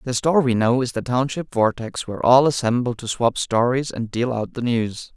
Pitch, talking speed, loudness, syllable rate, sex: 125 Hz, 220 wpm, -20 LUFS, 5.2 syllables/s, male